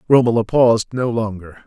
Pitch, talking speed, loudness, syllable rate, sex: 115 Hz, 145 wpm, -17 LUFS, 5.5 syllables/s, male